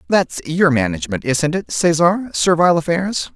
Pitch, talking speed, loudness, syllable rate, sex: 160 Hz, 145 wpm, -17 LUFS, 4.9 syllables/s, male